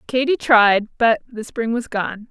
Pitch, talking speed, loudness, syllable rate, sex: 230 Hz, 180 wpm, -18 LUFS, 3.8 syllables/s, female